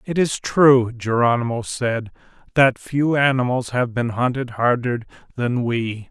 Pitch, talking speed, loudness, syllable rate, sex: 125 Hz, 140 wpm, -20 LUFS, 4.1 syllables/s, male